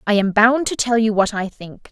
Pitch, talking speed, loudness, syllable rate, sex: 220 Hz, 280 wpm, -17 LUFS, 5.0 syllables/s, female